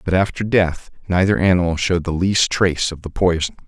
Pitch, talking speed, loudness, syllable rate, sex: 90 Hz, 195 wpm, -18 LUFS, 5.7 syllables/s, male